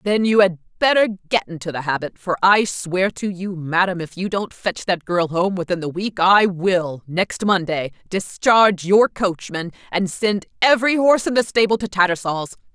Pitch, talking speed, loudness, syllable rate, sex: 190 Hz, 190 wpm, -19 LUFS, 4.8 syllables/s, female